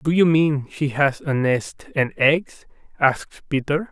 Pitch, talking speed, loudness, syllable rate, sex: 145 Hz, 170 wpm, -20 LUFS, 3.8 syllables/s, male